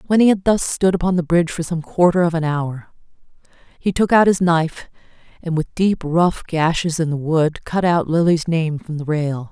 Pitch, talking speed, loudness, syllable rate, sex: 165 Hz, 215 wpm, -18 LUFS, 5.1 syllables/s, female